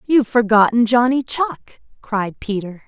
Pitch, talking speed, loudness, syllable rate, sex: 230 Hz, 125 wpm, -17 LUFS, 4.3 syllables/s, female